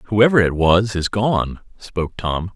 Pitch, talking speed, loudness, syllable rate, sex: 95 Hz, 165 wpm, -18 LUFS, 3.9 syllables/s, male